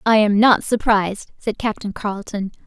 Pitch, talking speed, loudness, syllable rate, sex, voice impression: 210 Hz, 160 wpm, -19 LUFS, 5.0 syllables/s, female, feminine, slightly young, bright, very cute, refreshing, friendly, slightly lively